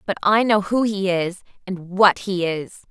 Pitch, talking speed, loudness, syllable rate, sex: 190 Hz, 205 wpm, -20 LUFS, 4.3 syllables/s, female